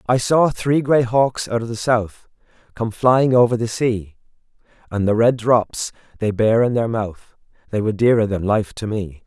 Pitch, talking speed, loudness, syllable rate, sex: 115 Hz, 195 wpm, -19 LUFS, 4.5 syllables/s, male